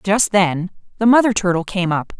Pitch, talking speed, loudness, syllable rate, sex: 195 Hz, 190 wpm, -17 LUFS, 4.8 syllables/s, female